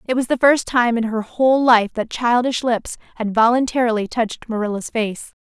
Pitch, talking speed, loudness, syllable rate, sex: 235 Hz, 190 wpm, -18 LUFS, 5.2 syllables/s, female